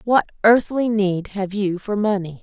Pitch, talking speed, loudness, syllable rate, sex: 205 Hz, 175 wpm, -20 LUFS, 4.2 syllables/s, female